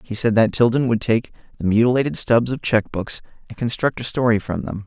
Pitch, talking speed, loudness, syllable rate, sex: 115 Hz, 220 wpm, -20 LUFS, 5.7 syllables/s, male